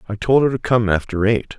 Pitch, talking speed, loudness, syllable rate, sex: 110 Hz, 265 wpm, -18 LUFS, 5.7 syllables/s, male